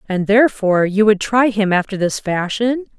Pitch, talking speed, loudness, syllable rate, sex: 210 Hz, 180 wpm, -16 LUFS, 5.2 syllables/s, female